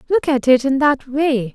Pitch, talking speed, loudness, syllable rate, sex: 270 Hz, 235 wpm, -16 LUFS, 4.4 syllables/s, female